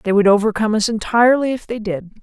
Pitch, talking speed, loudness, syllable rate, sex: 215 Hz, 215 wpm, -17 LUFS, 6.6 syllables/s, female